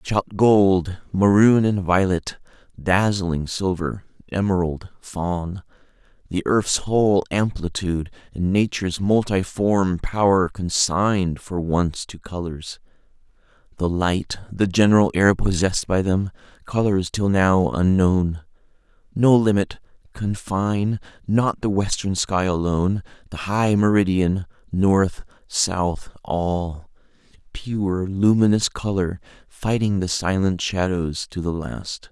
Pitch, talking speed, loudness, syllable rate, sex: 95 Hz, 105 wpm, -21 LUFS, 3.7 syllables/s, male